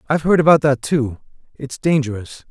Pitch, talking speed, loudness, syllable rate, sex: 135 Hz, 170 wpm, -17 LUFS, 5.5 syllables/s, male